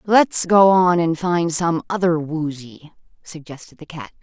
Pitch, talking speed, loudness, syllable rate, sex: 170 Hz, 155 wpm, -17 LUFS, 4.0 syllables/s, female